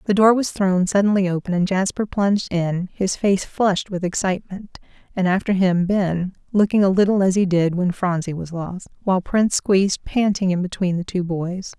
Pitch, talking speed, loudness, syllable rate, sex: 190 Hz, 195 wpm, -20 LUFS, 5.1 syllables/s, female